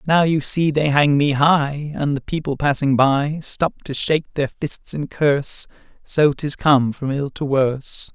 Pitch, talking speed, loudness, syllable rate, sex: 145 Hz, 190 wpm, -19 LUFS, 4.2 syllables/s, male